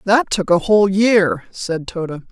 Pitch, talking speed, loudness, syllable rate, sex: 190 Hz, 180 wpm, -16 LUFS, 3.9 syllables/s, female